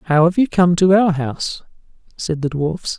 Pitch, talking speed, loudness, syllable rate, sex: 170 Hz, 200 wpm, -17 LUFS, 4.8 syllables/s, male